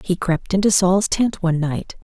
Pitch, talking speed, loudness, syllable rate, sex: 180 Hz, 200 wpm, -19 LUFS, 4.7 syllables/s, female